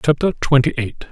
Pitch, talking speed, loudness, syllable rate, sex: 130 Hz, 160 wpm, -18 LUFS, 5.2 syllables/s, male